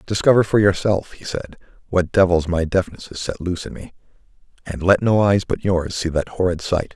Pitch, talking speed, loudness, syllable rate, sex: 90 Hz, 205 wpm, -19 LUFS, 5.4 syllables/s, male